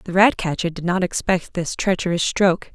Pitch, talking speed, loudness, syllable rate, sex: 180 Hz, 175 wpm, -20 LUFS, 5.4 syllables/s, female